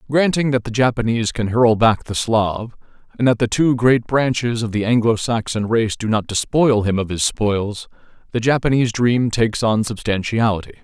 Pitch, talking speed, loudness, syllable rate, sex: 115 Hz, 185 wpm, -18 LUFS, 5.1 syllables/s, male